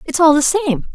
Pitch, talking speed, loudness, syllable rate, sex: 320 Hz, 255 wpm, -14 LUFS, 5.1 syllables/s, female